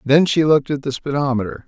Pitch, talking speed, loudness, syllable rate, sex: 140 Hz, 215 wpm, -18 LUFS, 6.4 syllables/s, male